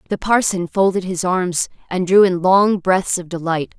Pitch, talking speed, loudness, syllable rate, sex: 185 Hz, 190 wpm, -17 LUFS, 4.5 syllables/s, female